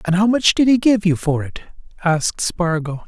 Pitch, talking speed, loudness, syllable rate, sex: 185 Hz, 215 wpm, -17 LUFS, 5.3 syllables/s, male